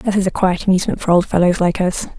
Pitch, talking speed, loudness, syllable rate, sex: 185 Hz, 275 wpm, -16 LUFS, 6.8 syllables/s, female